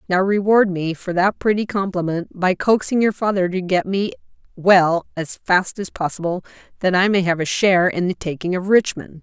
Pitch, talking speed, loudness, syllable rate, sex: 185 Hz, 195 wpm, -19 LUFS, 5.2 syllables/s, female